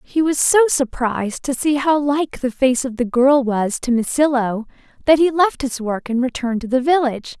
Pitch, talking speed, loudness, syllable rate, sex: 260 Hz, 210 wpm, -18 LUFS, 5.0 syllables/s, female